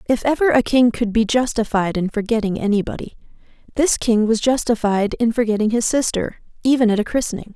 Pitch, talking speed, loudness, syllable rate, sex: 225 Hz, 175 wpm, -18 LUFS, 5.8 syllables/s, female